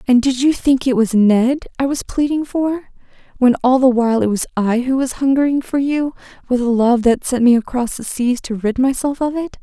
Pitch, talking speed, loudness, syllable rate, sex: 255 Hz, 230 wpm, -16 LUFS, 5.2 syllables/s, female